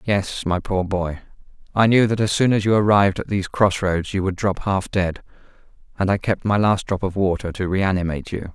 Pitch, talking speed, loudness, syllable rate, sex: 95 Hz, 225 wpm, -20 LUFS, 5.5 syllables/s, male